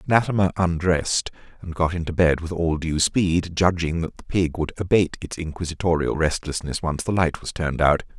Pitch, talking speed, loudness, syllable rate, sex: 85 Hz, 185 wpm, -22 LUFS, 5.3 syllables/s, male